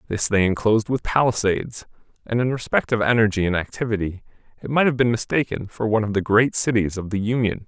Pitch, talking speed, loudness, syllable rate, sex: 110 Hz, 205 wpm, -21 LUFS, 6.3 syllables/s, male